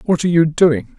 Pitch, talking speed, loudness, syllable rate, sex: 160 Hz, 245 wpm, -15 LUFS, 5.9 syllables/s, male